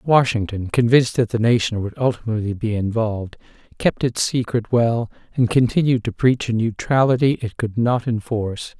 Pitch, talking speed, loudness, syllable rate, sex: 115 Hz, 155 wpm, -20 LUFS, 5.3 syllables/s, male